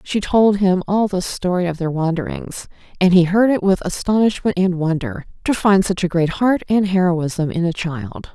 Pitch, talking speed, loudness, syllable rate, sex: 185 Hz, 200 wpm, -18 LUFS, 4.7 syllables/s, female